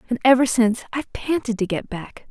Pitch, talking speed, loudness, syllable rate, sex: 240 Hz, 210 wpm, -21 LUFS, 6.1 syllables/s, female